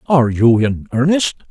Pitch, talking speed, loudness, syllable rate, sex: 130 Hz, 160 wpm, -15 LUFS, 5.1 syllables/s, male